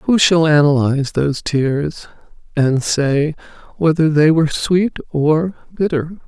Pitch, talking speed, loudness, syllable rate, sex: 155 Hz, 125 wpm, -16 LUFS, 4.0 syllables/s, female